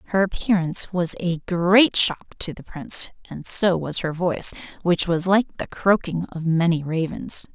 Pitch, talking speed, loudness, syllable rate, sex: 175 Hz, 175 wpm, -21 LUFS, 4.5 syllables/s, female